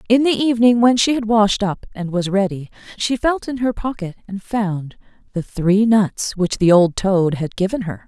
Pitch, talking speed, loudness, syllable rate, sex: 205 Hz, 210 wpm, -18 LUFS, 4.7 syllables/s, female